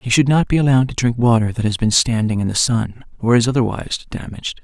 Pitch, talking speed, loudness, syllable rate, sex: 120 Hz, 245 wpm, -17 LUFS, 6.4 syllables/s, male